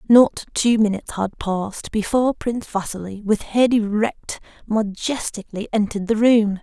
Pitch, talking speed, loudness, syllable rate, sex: 215 Hz, 135 wpm, -20 LUFS, 4.9 syllables/s, female